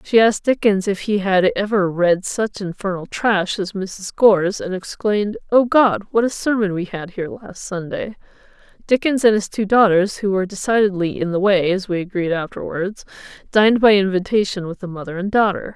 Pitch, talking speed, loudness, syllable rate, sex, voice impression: 195 Hz, 180 wpm, -18 LUFS, 5.3 syllables/s, female, feminine, middle-aged, slightly thick, slightly relaxed, slightly bright, soft, intellectual, calm, friendly, reassuring, elegant, kind, modest